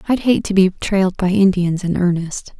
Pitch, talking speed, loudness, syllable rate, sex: 190 Hz, 210 wpm, -16 LUFS, 5.1 syllables/s, female